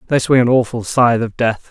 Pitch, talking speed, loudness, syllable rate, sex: 120 Hz, 245 wpm, -15 LUFS, 6.0 syllables/s, male